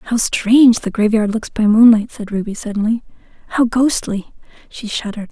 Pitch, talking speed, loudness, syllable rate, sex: 220 Hz, 160 wpm, -15 LUFS, 5.3 syllables/s, female